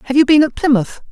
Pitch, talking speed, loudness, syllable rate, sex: 280 Hz, 270 wpm, -13 LUFS, 6.8 syllables/s, female